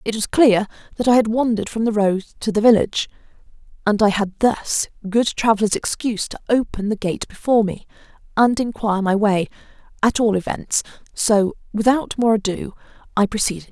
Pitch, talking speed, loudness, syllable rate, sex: 215 Hz, 170 wpm, -19 LUFS, 5.6 syllables/s, female